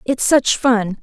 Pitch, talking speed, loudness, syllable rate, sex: 235 Hz, 175 wpm, -15 LUFS, 3.3 syllables/s, female